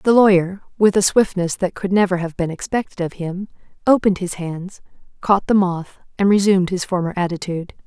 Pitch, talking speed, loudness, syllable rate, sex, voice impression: 185 Hz, 185 wpm, -19 LUFS, 5.6 syllables/s, female, feminine, slightly gender-neutral, slightly young, slightly adult-like, slightly thin, slightly tensed, slightly powerful, slightly dark, hard, slightly clear, fluent, cute, intellectual, slightly refreshing, sincere, slightly calm, very friendly, reassuring, very elegant, sweet, slightly lively, very kind, slightly modest